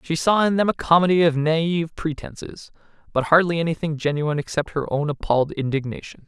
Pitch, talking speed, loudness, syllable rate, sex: 160 Hz, 170 wpm, -21 LUFS, 5.9 syllables/s, male